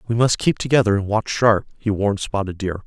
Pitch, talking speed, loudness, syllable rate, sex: 105 Hz, 230 wpm, -20 LUFS, 5.9 syllables/s, male